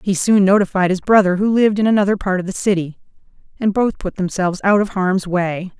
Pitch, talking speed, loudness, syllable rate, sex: 195 Hz, 215 wpm, -17 LUFS, 6.0 syllables/s, female